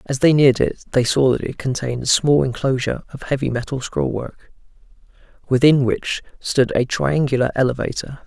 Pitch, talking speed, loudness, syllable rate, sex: 130 Hz, 160 wpm, -19 LUFS, 5.4 syllables/s, male